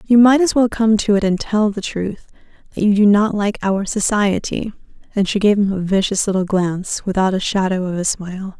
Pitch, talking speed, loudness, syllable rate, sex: 200 Hz, 225 wpm, -17 LUFS, 5.3 syllables/s, female